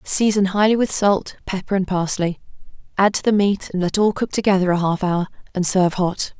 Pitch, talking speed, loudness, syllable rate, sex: 190 Hz, 205 wpm, -19 LUFS, 5.5 syllables/s, female